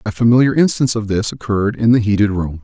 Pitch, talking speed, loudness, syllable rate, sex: 110 Hz, 230 wpm, -15 LUFS, 6.7 syllables/s, male